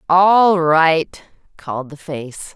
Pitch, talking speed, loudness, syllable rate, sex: 165 Hz, 120 wpm, -15 LUFS, 3.0 syllables/s, female